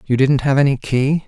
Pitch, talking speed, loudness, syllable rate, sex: 135 Hz, 235 wpm, -16 LUFS, 5.1 syllables/s, male